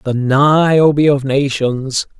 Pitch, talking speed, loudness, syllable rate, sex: 140 Hz, 110 wpm, -13 LUFS, 3.0 syllables/s, male